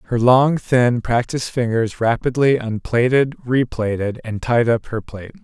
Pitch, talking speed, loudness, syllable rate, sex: 120 Hz, 145 wpm, -18 LUFS, 4.4 syllables/s, male